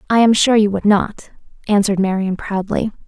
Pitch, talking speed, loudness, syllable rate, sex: 205 Hz, 175 wpm, -16 LUFS, 5.4 syllables/s, female